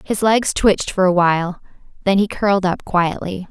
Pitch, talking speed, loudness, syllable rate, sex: 190 Hz, 190 wpm, -17 LUFS, 5.1 syllables/s, female